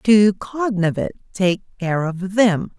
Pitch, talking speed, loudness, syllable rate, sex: 195 Hz, 110 wpm, -19 LUFS, 3.5 syllables/s, female